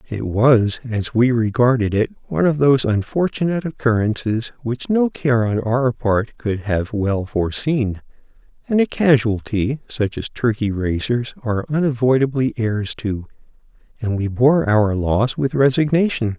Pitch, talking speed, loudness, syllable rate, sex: 120 Hz, 145 wpm, -19 LUFS, 4.5 syllables/s, male